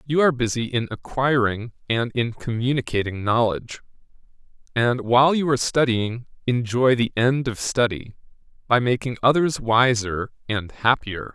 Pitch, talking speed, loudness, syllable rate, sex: 120 Hz, 130 wpm, -22 LUFS, 4.8 syllables/s, male